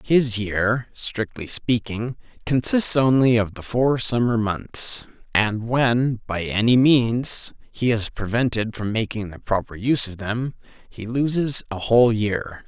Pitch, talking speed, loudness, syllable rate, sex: 115 Hz, 145 wpm, -21 LUFS, 3.9 syllables/s, male